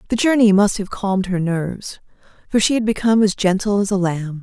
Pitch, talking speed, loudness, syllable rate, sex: 200 Hz, 215 wpm, -18 LUFS, 5.9 syllables/s, female